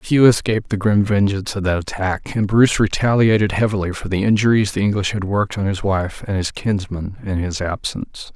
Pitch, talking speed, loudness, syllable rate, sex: 100 Hz, 200 wpm, -19 LUFS, 5.6 syllables/s, male